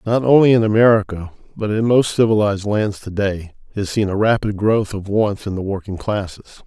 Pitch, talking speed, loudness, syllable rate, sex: 105 Hz, 200 wpm, -17 LUFS, 5.4 syllables/s, male